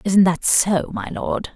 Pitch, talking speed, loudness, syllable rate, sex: 190 Hz, 195 wpm, -19 LUFS, 3.5 syllables/s, female